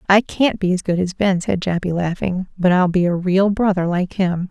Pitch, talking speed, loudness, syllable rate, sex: 185 Hz, 240 wpm, -18 LUFS, 5.0 syllables/s, female